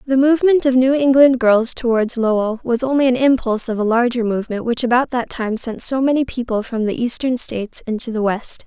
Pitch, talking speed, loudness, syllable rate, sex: 245 Hz, 215 wpm, -17 LUFS, 5.7 syllables/s, female